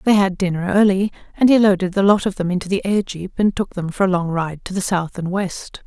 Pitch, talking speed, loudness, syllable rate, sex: 190 Hz, 265 wpm, -19 LUFS, 5.7 syllables/s, female